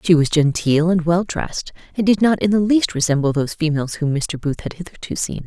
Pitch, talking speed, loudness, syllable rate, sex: 165 Hz, 230 wpm, -18 LUFS, 5.6 syllables/s, female